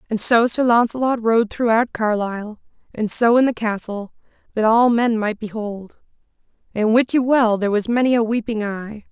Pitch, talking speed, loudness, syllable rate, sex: 225 Hz, 180 wpm, -18 LUFS, 5.0 syllables/s, female